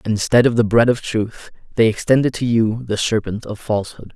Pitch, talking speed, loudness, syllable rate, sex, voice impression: 115 Hz, 200 wpm, -18 LUFS, 5.4 syllables/s, male, very masculine, very adult-like, slightly middle-aged, very thick, slightly tensed, slightly powerful, bright, slightly soft, clear, fluent, slightly raspy, very cool, intellectual, refreshing, very sincere, very calm, mature, very friendly, very reassuring, very unique, very elegant, wild, very sweet, lively, very kind, slightly intense, slightly modest, slightly light